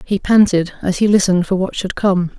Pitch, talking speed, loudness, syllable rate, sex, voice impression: 190 Hz, 225 wpm, -15 LUFS, 5.5 syllables/s, female, feminine, very adult-like, slightly relaxed, slightly dark, muffled, slightly halting, calm, reassuring